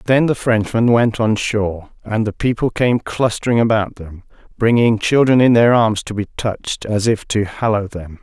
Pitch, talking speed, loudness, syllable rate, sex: 110 Hz, 190 wpm, -16 LUFS, 4.8 syllables/s, male